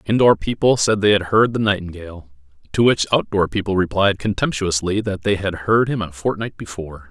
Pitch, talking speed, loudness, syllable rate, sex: 100 Hz, 205 wpm, -18 LUFS, 5.5 syllables/s, male